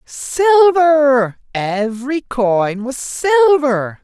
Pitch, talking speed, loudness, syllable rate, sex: 270 Hz, 75 wpm, -15 LUFS, 2.4 syllables/s, male